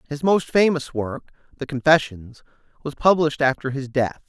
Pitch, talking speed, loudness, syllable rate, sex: 145 Hz, 155 wpm, -20 LUFS, 5.2 syllables/s, male